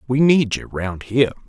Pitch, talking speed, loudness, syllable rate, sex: 120 Hz, 205 wpm, -19 LUFS, 5.1 syllables/s, male